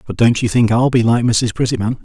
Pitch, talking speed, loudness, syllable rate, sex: 115 Hz, 265 wpm, -15 LUFS, 6.0 syllables/s, male